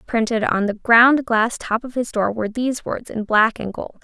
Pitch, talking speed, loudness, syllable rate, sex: 230 Hz, 240 wpm, -19 LUFS, 4.9 syllables/s, female